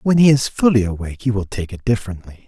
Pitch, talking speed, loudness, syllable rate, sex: 110 Hz, 245 wpm, -18 LUFS, 6.6 syllables/s, male